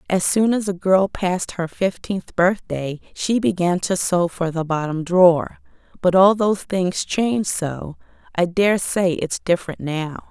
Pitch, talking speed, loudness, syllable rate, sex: 180 Hz, 170 wpm, -20 LUFS, 4.2 syllables/s, female